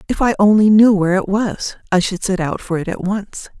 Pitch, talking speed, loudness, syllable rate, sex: 195 Hz, 250 wpm, -16 LUFS, 5.4 syllables/s, female